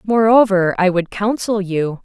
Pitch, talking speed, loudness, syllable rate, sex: 195 Hz, 145 wpm, -16 LUFS, 4.3 syllables/s, female